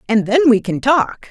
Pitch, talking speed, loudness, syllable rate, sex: 240 Hz, 230 wpm, -15 LUFS, 4.4 syllables/s, female